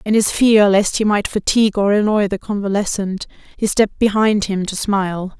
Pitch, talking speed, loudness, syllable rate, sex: 205 Hz, 190 wpm, -16 LUFS, 5.2 syllables/s, female